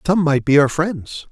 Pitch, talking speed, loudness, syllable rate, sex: 155 Hz, 230 wpm, -16 LUFS, 4.3 syllables/s, male